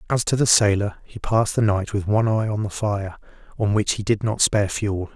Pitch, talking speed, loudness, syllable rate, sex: 105 Hz, 245 wpm, -21 LUFS, 5.5 syllables/s, male